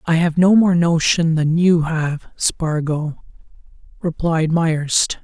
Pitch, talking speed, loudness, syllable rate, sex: 165 Hz, 125 wpm, -17 LUFS, 3.3 syllables/s, male